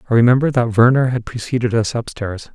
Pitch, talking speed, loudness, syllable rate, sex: 120 Hz, 190 wpm, -17 LUFS, 6.4 syllables/s, male